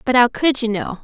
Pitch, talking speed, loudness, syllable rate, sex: 240 Hz, 290 wpm, -17 LUFS, 5.4 syllables/s, female